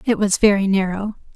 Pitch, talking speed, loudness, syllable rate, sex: 200 Hz, 175 wpm, -18 LUFS, 5.4 syllables/s, female